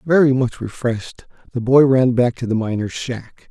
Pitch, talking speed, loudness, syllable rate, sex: 125 Hz, 190 wpm, -18 LUFS, 4.8 syllables/s, male